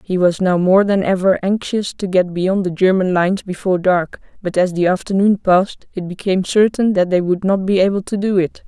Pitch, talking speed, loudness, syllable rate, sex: 190 Hz, 220 wpm, -16 LUFS, 5.4 syllables/s, female